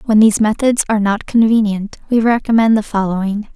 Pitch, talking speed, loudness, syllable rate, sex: 215 Hz, 170 wpm, -14 LUFS, 5.9 syllables/s, female